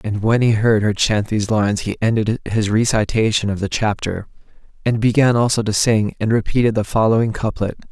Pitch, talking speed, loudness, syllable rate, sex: 110 Hz, 190 wpm, -18 LUFS, 5.5 syllables/s, male